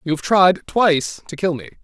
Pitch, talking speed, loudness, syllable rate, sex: 160 Hz, 230 wpm, -17 LUFS, 5.1 syllables/s, male